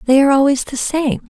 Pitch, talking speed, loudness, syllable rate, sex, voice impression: 275 Hz, 220 wpm, -15 LUFS, 6.1 syllables/s, female, very feminine, very adult-like, very middle-aged, very thin, slightly relaxed, weak, dark, very soft, very muffled, slightly fluent, very cute, very intellectual, refreshing, very sincere, very calm, very friendly, very reassuring, very unique, very elegant, very sweet, slightly lively, very kind, very modest, light